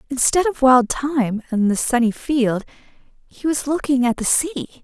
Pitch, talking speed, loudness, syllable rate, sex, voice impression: 260 Hz, 175 wpm, -19 LUFS, 5.0 syllables/s, female, feminine, adult-like, tensed, powerful, clear, fluent, intellectual, elegant, lively, slightly strict, intense, sharp